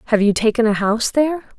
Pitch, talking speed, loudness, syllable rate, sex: 230 Hz, 225 wpm, -17 LUFS, 7.5 syllables/s, female